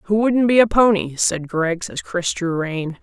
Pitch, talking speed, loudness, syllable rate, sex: 190 Hz, 220 wpm, -18 LUFS, 4.0 syllables/s, female